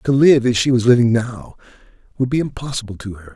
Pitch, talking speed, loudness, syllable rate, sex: 125 Hz, 215 wpm, -16 LUFS, 6.1 syllables/s, male